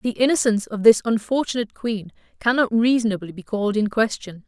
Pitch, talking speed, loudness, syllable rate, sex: 220 Hz, 160 wpm, -21 LUFS, 6.1 syllables/s, female